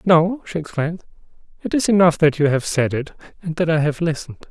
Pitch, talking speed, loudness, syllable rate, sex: 160 Hz, 215 wpm, -19 LUFS, 5.9 syllables/s, male